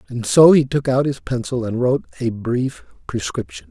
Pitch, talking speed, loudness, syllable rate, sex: 125 Hz, 195 wpm, -18 LUFS, 5.1 syllables/s, male